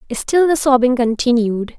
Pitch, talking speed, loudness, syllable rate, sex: 250 Hz, 135 wpm, -15 LUFS, 4.6 syllables/s, female